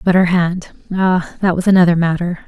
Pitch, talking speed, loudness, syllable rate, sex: 180 Hz, 170 wpm, -15 LUFS, 5.3 syllables/s, female